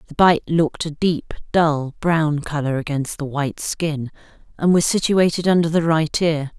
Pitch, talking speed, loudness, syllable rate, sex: 155 Hz, 175 wpm, -19 LUFS, 4.6 syllables/s, female